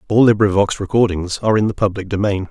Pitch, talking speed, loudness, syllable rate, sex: 100 Hz, 190 wpm, -16 LUFS, 6.6 syllables/s, male